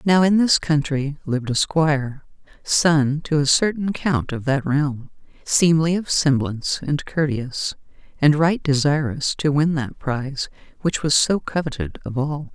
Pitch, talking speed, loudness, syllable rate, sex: 150 Hz, 160 wpm, -20 LUFS, 4.3 syllables/s, female